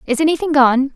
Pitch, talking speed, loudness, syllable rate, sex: 285 Hz, 190 wpm, -14 LUFS, 6.0 syllables/s, female